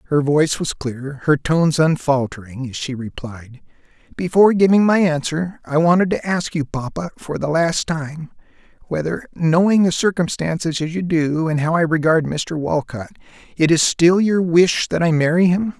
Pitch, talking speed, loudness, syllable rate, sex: 160 Hz, 175 wpm, -18 LUFS, 4.8 syllables/s, male